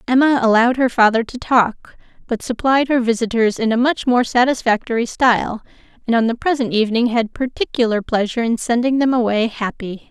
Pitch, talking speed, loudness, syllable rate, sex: 235 Hz, 165 wpm, -17 LUFS, 5.6 syllables/s, female